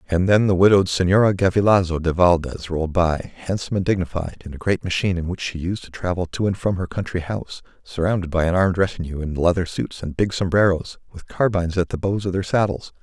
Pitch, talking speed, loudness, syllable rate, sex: 90 Hz, 220 wpm, -21 LUFS, 6.2 syllables/s, male